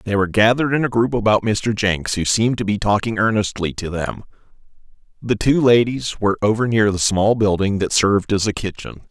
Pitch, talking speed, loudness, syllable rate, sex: 105 Hz, 205 wpm, -18 LUFS, 5.7 syllables/s, male